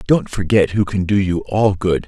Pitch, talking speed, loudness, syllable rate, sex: 95 Hz, 230 wpm, -17 LUFS, 4.7 syllables/s, male